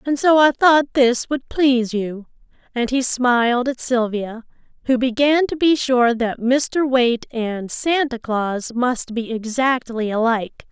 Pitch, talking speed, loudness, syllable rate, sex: 250 Hz, 155 wpm, -18 LUFS, 4.0 syllables/s, female